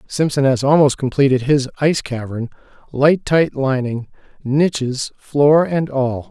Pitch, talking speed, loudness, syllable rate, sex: 135 Hz, 135 wpm, -17 LUFS, 4.2 syllables/s, male